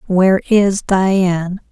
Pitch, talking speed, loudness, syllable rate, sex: 190 Hz, 105 wpm, -14 LUFS, 3.5 syllables/s, female